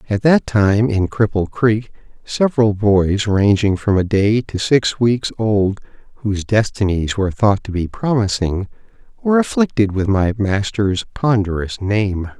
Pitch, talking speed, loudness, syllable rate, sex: 105 Hz, 145 wpm, -17 LUFS, 4.3 syllables/s, male